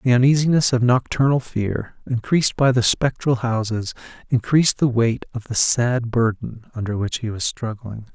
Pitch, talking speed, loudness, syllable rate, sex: 120 Hz, 160 wpm, -20 LUFS, 4.8 syllables/s, male